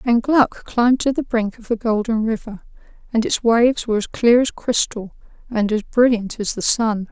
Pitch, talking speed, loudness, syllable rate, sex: 230 Hz, 200 wpm, -19 LUFS, 5.0 syllables/s, female